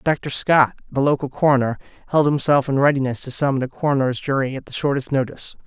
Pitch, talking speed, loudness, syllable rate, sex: 135 Hz, 190 wpm, -20 LUFS, 6.4 syllables/s, male